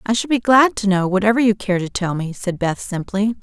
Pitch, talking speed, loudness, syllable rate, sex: 205 Hz, 265 wpm, -18 LUFS, 5.5 syllables/s, female